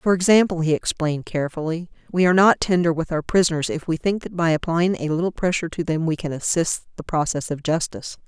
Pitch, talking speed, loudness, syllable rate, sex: 165 Hz, 215 wpm, -21 LUFS, 6.3 syllables/s, female